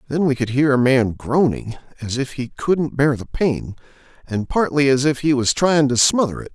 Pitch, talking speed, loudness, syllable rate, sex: 135 Hz, 220 wpm, -19 LUFS, 4.9 syllables/s, male